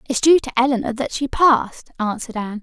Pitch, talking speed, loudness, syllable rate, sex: 250 Hz, 205 wpm, -18 LUFS, 6.6 syllables/s, female